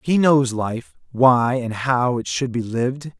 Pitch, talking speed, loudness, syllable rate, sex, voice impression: 125 Hz, 190 wpm, -19 LUFS, 3.8 syllables/s, male, masculine, adult-like, slightly powerful, slightly soft, fluent, cool, intellectual, slightly mature, friendly, wild, lively, kind